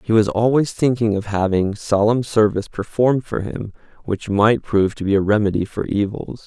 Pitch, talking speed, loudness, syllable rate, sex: 105 Hz, 185 wpm, -19 LUFS, 5.3 syllables/s, male